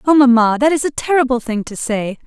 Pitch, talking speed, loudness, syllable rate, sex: 255 Hz, 240 wpm, -15 LUFS, 5.8 syllables/s, female